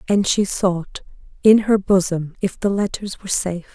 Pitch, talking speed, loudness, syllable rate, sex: 190 Hz, 175 wpm, -19 LUFS, 4.9 syllables/s, female